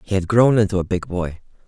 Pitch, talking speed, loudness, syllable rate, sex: 95 Hz, 250 wpm, -19 LUFS, 6.0 syllables/s, male